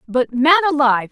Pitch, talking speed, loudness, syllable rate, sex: 275 Hz, 160 wpm, -15 LUFS, 6.4 syllables/s, female